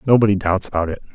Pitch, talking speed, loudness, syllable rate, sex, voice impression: 100 Hz, 210 wpm, -18 LUFS, 7.8 syllables/s, male, masculine, adult-like, slightly thick, fluent, cool, intellectual, calm, slightly reassuring